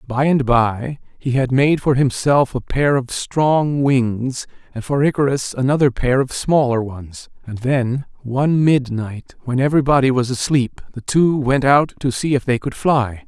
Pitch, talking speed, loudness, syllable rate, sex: 135 Hz, 175 wpm, -17 LUFS, 4.3 syllables/s, male